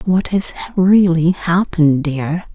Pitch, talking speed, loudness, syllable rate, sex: 170 Hz, 120 wpm, -15 LUFS, 3.8 syllables/s, female